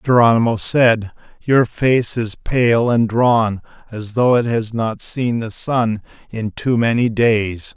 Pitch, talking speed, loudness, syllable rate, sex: 115 Hz, 155 wpm, -17 LUFS, 3.5 syllables/s, male